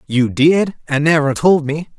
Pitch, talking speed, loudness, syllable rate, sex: 150 Hz, 150 wpm, -15 LUFS, 4.3 syllables/s, male